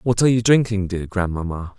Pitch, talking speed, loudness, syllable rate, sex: 100 Hz, 200 wpm, -20 LUFS, 5.8 syllables/s, male